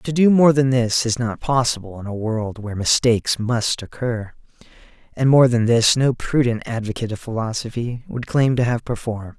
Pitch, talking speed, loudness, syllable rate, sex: 120 Hz, 185 wpm, -19 LUFS, 5.1 syllables/s, male